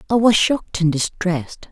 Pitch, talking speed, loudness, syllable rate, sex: 190 Hz, 175 wpm, -18 LUFS, 5.4 syllables/s, female